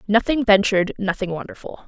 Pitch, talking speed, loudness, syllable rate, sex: 205 Hz, 130 wpm, -19 LUFS, 6.1 syllables/s, female